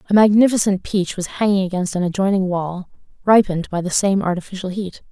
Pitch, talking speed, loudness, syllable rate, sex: 190 Hz, 175 wpm, -18 LUFS, 6.0 syllables/s, female